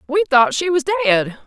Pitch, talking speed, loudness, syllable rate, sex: 290 Hz, 205 wpm, -16 LUFS, 7.1 syllables/s, female